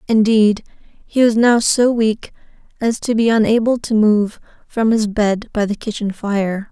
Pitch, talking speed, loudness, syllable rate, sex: 220 Hz, 170 wpm, -16 LUFS, 4.2 syllables/s, female